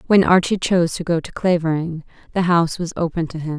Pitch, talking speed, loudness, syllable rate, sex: 170 Hz, 220 wpm, -19 LUFS, 6.0 syllables/s, female